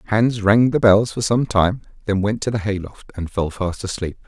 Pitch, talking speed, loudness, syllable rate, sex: 105 Hz, 240 wpm, -19 LUFS, 4.9 syllables/s, male